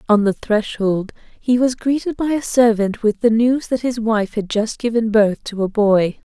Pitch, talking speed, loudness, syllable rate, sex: 225 Hz, 210 wpm, -18 LUFS, 4.5 syllables/s, female